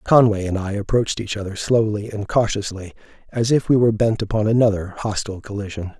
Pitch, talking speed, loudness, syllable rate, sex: 105 Hz, 180 wpm, -20 LUFS, 6.0 syllables/s, male